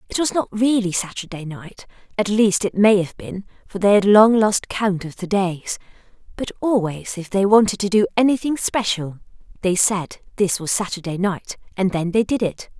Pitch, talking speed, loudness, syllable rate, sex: 195 Hz, 190 wpm, -19 LUFS, 4.9 syllables/s, female